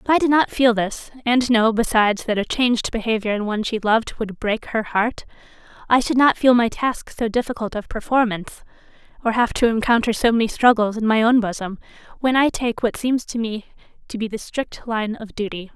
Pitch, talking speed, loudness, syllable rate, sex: 230 Hz, 215 wpm, -20 LUFS, 5.6 syllables/s, female